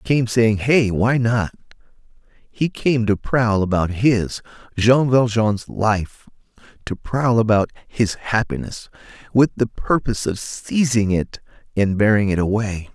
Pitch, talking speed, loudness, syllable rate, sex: 110 Hz, 140 wpm, -19 LUFS, 3.9 syllables/s, male